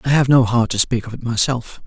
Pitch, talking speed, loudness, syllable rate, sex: 120 Hz, 290 wpm, -17 LUFS, 5.7 syllables/s, male